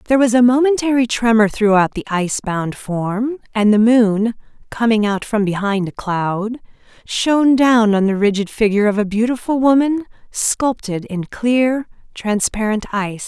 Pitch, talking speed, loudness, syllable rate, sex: 225 Hz, 155 wpm, -16 LUFS, 4.8 syllables/s, female